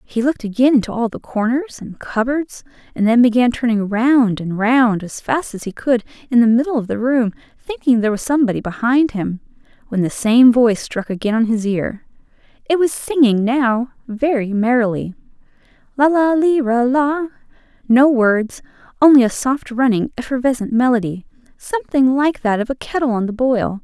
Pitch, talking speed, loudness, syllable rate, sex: 245 Hz, 170 wpm, -17 LUFS, 5.1 syllables/s, female